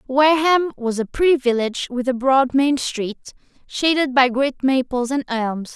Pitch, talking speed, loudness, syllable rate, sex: 265 Hz, 165 wpm, -19 LUFS, 4.6 syllables/s, female